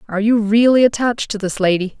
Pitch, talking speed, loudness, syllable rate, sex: 215 Hz, 210 wpm, -16 LUFS, 6.6 syllables/s, female